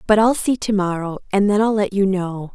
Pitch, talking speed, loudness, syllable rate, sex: 200 Hz, 260 wpm, -19 LUFS, 5.3 syllables/s, female